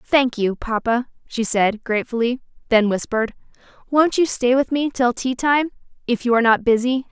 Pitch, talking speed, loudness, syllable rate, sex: 245 Hz, 175 wpm, -19 LUFS, 5.2 syllables/s, female